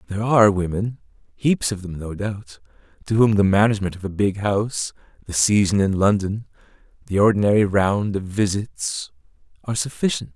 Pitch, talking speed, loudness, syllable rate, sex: 100 Hz, 155 wpm, -20 LUFS, 5.4 syllables/s, male